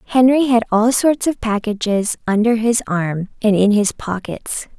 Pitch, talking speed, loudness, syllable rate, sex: 220 Hz, 165 wpm, -17 LUFS, 4.3 syllables/s, female